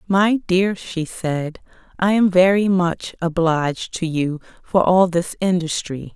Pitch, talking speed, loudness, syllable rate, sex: 175 Hz, 145 wpm, -19 LUFS, 3.8 syllables/s, female